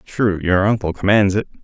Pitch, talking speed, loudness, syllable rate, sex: 100 Hz, 185 wpm, -17 LUFS, 5.2 syllables/s, male